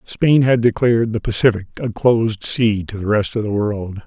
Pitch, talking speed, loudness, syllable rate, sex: 110 Hz, 205 wpm, -17 LUFS, 5.0 syllables/s, male